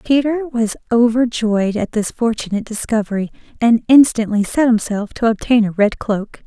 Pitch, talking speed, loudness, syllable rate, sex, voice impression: 225 Hz, 150 wpm, -16 LUFS, 4.9 syllables/s, female, feminine, adult-like, slightly intellectual, elegant, slightly sweet, slightly kind